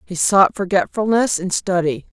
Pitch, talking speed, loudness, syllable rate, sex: 190 Hz, 135 wpm, -17 LUFS, 4.6 syllables/s, female